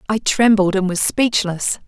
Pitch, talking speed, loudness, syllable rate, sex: 205 Hz, 160 wpm, -17 LUFS, 4.3 syllables/s, female